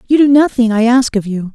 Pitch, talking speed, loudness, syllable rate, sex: 240 Hz, 270 wpm, -12 LUFS, 5.8 syllables/s, female